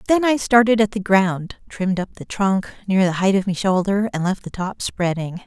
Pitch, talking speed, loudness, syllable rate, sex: 195 Hz, 230 wpm, -20 LUFS, 5.0 syllables/s, female